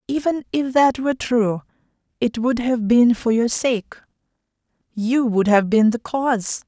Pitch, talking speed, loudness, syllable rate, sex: 240 Hz, 160 wpm, -19 LUFS, 4.3 syllables/s, female